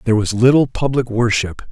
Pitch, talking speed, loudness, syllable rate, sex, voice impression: 120 Hz, 175 wpm, -16 LUFS, 5.8 syllables/s, male, very masculine, adult-like, thick, tensed, slightly powerful, slightly bright, soft, clear, fluent, slightly raspy, cool, very intellectual, refreshing, sincere, calm, slightly mature, very friendly, reassuring, unique, very elegant, wild, very sweet, lively, kind, slightly intense